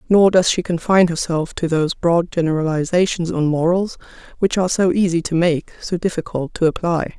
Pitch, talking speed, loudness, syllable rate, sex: 170 Hz, 175 wpm, -18 LUFS, 5.6 syllables/s, female